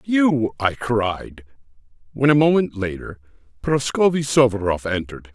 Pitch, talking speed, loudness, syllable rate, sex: 120 Hz, 110 wpm, -20 LUFS, 4.4 syllables/s, male